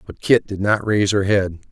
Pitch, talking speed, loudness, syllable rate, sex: 100 Hz, 245 wpm, -18 LUFS, 5.4 syllables/s, male